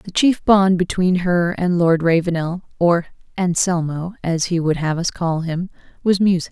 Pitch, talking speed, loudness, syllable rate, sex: 175 Hz, 155 wpm, -18 LUFS, 4.4 syllables/s, female